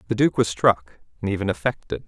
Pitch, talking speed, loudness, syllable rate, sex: 105 Hz, 200 wpm, -23 LUFS, 6.0 syllables/s, male